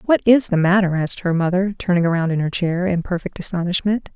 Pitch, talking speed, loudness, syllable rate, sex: 180 Hz, 215 wpm, -19 LUFS, 6.1 syllables/s, female